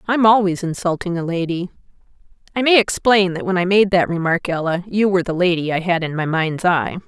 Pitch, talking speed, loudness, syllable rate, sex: 180 Hz, 205 wpm, -18 LUFS, 5.0 syllables/s, female